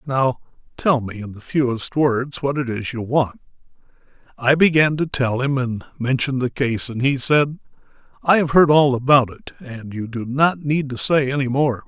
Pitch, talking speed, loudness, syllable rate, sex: 135 Hz, 195 wpm, -19 LUFS, 4.7 syllables/s, male